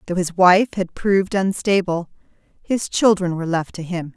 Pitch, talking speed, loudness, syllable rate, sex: 185 Hz, 175 wpm, -19 LUFS, 5.0 syllables/s, female